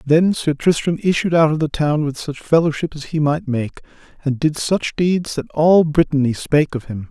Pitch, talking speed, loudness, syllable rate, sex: 150 Hz, 210 wpm, -18 LUFS, 5.0 syllables/s, male